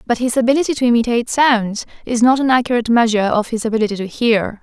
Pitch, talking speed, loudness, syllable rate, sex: 235 Hz, 205 wpm, -16 LUFS, 7.0 syllables/s, female